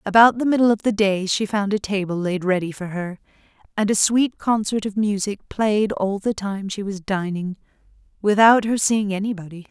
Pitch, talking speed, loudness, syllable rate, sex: 205 Hz, 190 wpm, -20 LUFS, 5.0 syllables/s, female